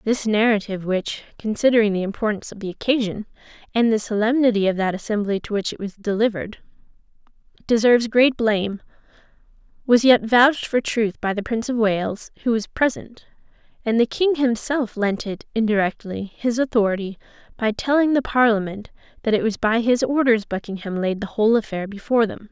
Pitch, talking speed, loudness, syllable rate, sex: 220 Hz, 165 wpm, -21 LUFS, 5.7 syllables/s, female